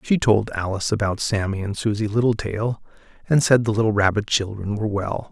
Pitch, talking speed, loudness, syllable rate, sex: 105 Hz, 180 wpm, -21 LUFS, 5.7 syllables/s, male